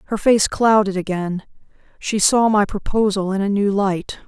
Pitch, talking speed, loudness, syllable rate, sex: 200 Hz, 155 wpm, -18 LUFS, 4.6 syllables/s, female